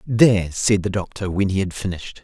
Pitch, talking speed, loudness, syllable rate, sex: 100 Hz, 215 wpm, -20 LUFS, 5.8 syllables/s, male